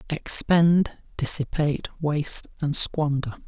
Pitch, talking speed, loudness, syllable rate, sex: 150 Hz, 85 wpm, -22 LUFS, 3.9 syllables/s, male